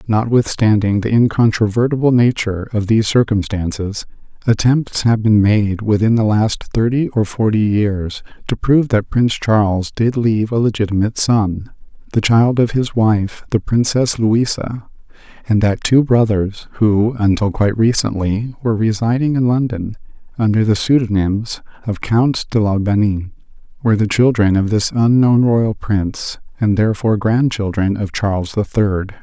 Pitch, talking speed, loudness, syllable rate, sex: 110 Hz, 140 wpm, -16 LUFS, 4.7 syllables/s, male